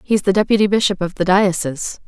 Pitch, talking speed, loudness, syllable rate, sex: 190 Hz, 205 wpm, -17 LUFS, 6.2 syllables/s, female